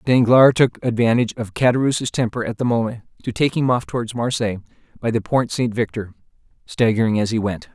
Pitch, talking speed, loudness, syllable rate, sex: 115 Hz, 185 wpm, -19 LUFS, 6.2 syllables/s, male